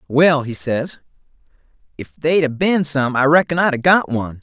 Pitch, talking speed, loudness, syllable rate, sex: 145 Hz, 190 wpm, -16 LUFS, 4.9 syllables/s, male